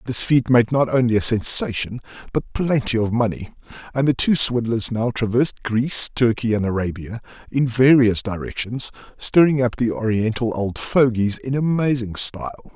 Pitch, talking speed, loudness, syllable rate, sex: 120 Hz, 155 wpm, -19 LUFS, 5.0 syllables/s, male